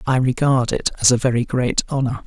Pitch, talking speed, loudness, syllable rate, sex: 125 Hz, 210 wpm, -18 LUFS, 5.5 syllables/s, male